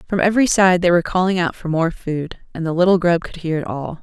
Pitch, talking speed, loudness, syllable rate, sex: 170 Hz, 270 wpm, -18 LUFS, 6.2 syllables/s, female